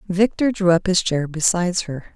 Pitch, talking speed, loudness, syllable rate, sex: 180 Hz, 195 wpm, -19 LUFS, 4.9 syllables/s, female